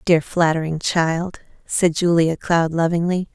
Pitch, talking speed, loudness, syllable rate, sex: 165 Hz, 125 wpm, -19 LUFS, 4.1 syllables/s, female